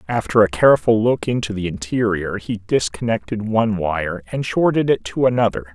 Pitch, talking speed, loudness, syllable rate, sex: 105 Hz, 165 wpm, -19 LUFS, 5.3 syllables/s, male